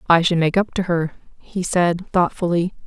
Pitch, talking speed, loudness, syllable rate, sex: 175 Hz, 190 wpm, -20 LUFS, 4.8 syllables/s, female